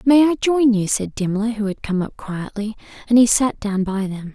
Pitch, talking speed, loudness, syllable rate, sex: 220 Hz, 235 wpm, -19 LUFS, 4.9 syllables/s, female